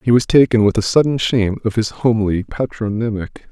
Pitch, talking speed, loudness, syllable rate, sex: 110 Hz, 190 wpm, -17 LUFS, 5.7 syllables/s, male